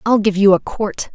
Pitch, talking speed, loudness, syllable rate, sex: 200 Hz, 260 wpm, -16 LUFS, 4.8 syllables/s, female